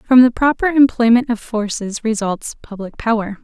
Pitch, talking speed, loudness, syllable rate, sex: 230 Hz, 155 wpm, -16 LUFS, 5.0 syllables/s, female